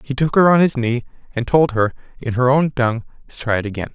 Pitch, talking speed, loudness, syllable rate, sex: 130 Hz, 260 wpm, -17 LUFS, 6.2 syllables/s, male